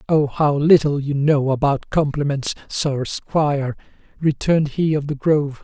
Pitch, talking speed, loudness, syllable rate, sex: 145 Hz, 150 wpm, -19 LUFS, 4.5 syllables/s, male